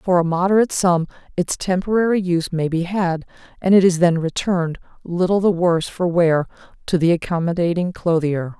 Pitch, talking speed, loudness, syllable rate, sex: 175 Hz, 170 wpm, -19 LUFS, 5.5 syllables/s, female